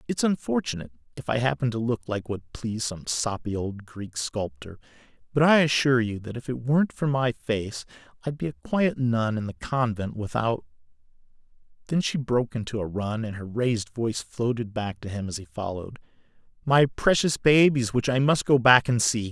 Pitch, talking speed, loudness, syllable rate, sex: 120 Hz, 185 wpm, -25 LUFS, 5.3 syllables/s, male